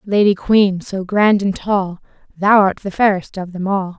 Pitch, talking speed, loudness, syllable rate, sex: 195 Hz, 195 wpm, -16 LUFS, 4.3 syllables/s, female